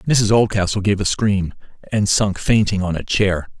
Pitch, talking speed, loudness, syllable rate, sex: 100 Hz, 185 wpm, -18 LUFS, 4.7 syllables/s, male